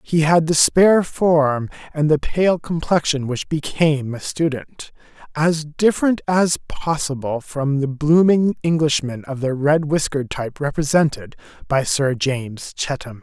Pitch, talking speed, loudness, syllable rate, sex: 150 Hz, 140 wpm, -19 LUFS, 4.3 syllables/s, male